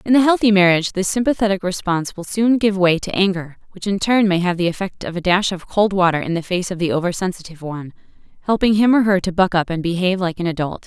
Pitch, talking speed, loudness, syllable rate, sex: 185 Hz, 250 wpm, -18 LUFS, 6.5 syllables/s, female